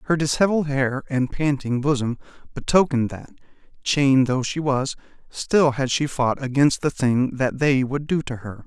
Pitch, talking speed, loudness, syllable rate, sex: 135 Hz, 175 wpm, -21 LUFS, 4.8 syllables/s, male